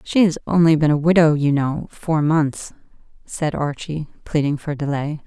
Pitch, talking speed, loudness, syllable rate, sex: 155 Hz, 170 wpm, -19 LUFS, 4.6 syllables/s, female